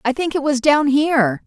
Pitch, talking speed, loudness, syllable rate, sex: 275 Hz, 245 wpm, -17 LUFS, 5.1 syllables/s, female